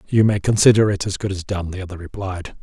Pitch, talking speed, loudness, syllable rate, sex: 95 Hz, 250 wpm, -19 LUFS, 6.2 syllables/s, male